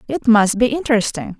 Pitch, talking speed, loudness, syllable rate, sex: 235 Hz, 170 wpm, -16 LUFS, 5.7 syllables/s, female